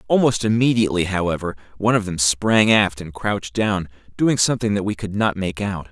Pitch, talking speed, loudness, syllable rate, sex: 100 Hz, 195 wpm, -20 LUFS, 5.8 syllables/s, male